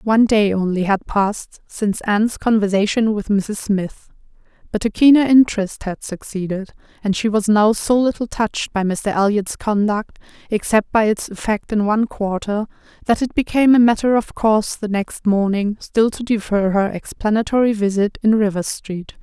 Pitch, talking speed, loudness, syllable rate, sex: 210 Hz, 170 wpm, -18 LUFS, 5.0 syllables/s, female